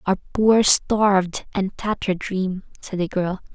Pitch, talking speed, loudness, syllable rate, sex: 195 Hz, 150 wpm, -21 LUFS, 4.1 syllables/s, female